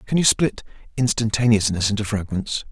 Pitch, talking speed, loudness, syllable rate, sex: 110 Hz, 135 wpm, -21 LUFS, 5.4 syllables/s, male